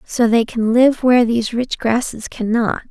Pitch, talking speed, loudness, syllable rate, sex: 235 Hz, 185 wpm, -16 LUFS, 4.8 syllables/s, female